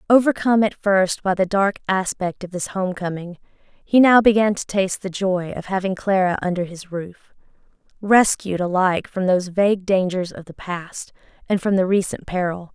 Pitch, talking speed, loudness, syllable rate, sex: 190 Hz, 180 wpm, -20 LUFS, 5.0 syllables/s, female